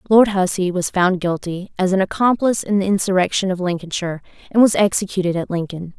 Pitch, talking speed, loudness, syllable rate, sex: 185 Hz, 180 wpm, -18 LUFS, 6.1 syllables/s, female